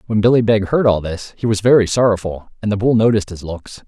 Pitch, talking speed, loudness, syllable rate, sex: 105 Hz, 250 wpm, -16 LUFS, 6.2 syllables/s, male